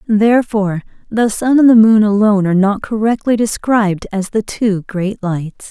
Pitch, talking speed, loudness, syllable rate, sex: 210 Hz, 170 wpm, -14 LUFS, 5.0 syllables/s, female